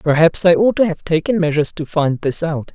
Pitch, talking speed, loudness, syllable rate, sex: 165 Hz, 240 wpm, -16 LUFS, 5.5 syllables/s, female